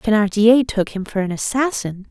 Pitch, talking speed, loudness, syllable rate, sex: 215 Hz, 170 wpm, -18 LUFS, 4.9 syllables/s, female